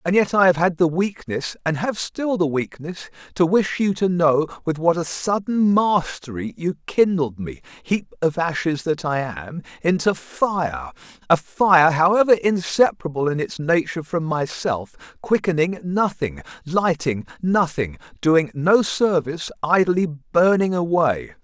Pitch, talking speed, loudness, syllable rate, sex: 165 Hz, 145 wpm, -20 LUFS, 4.3 syllables/s, male